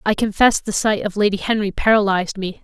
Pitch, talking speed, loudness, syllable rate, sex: 205 Hz, 205 wpm, -18 LUFS, 5.9 syllables/s, female